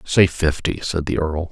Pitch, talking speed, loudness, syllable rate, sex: 80 Hz, 200 wpm, -20 LUFS, 4.4 syllables/s, male